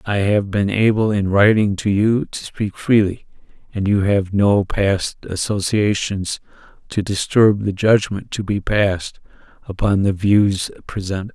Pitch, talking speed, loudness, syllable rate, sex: 100 Hz, 150 wpm, -18 LUFS, 4.2 syllables/s, male